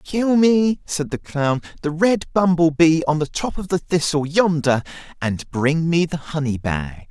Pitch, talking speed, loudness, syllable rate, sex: 160 Hz, 185 wpm, -20 LUFS, 4.1 syllables/s, male